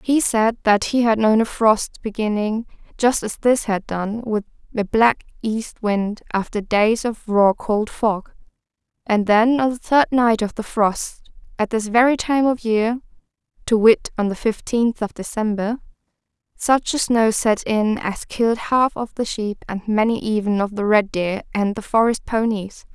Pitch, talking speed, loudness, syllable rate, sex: 220 Hz, 180 wpm, -20 LUFS, 3.9 syllables/s, female